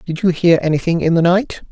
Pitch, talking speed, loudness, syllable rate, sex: 170 Hz, 245 wpm, -15 LUFS, 5.9 syllables/s, male